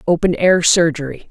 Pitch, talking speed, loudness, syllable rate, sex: 170 Hz, 140 wpm, -14 LUFS, 5.1 syllables/s, female